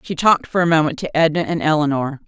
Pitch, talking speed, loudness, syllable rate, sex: 155 Hz, 240 wpm, -17 LUFS, 6.7 syllables/s, female